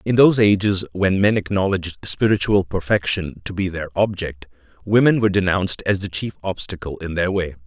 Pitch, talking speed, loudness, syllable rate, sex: 95 Hz, 170 wpm, -20 LUFS, 5.6 syllables/s, male